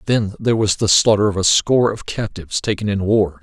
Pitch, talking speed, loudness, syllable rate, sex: 105 Hz, 230 wpm, -17 LUFS, 5.9 syllables/s, male